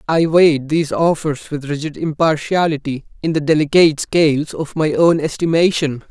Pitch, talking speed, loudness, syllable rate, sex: 155 Hz, 145 wpm, -16 LUFS, 5.2 syllables/s, male